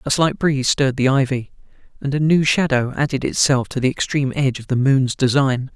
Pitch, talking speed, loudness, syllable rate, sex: 135 Hz, 210 wpm, -18 LUFS, 5.9 syllables/s, male